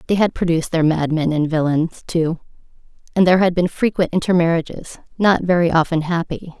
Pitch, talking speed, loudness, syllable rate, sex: 170 Hz, 155 wpm, -18 LUFS, 5.7 syllables/s, female